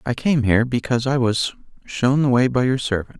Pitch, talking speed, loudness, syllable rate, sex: 125 Hz, 225 wpm, -19 LUFS, 5.7 syllables/s, male